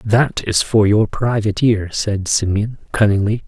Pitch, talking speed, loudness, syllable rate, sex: 105 Hz, 155 wpm, -17 LUFS, 4.4 syllables/s, male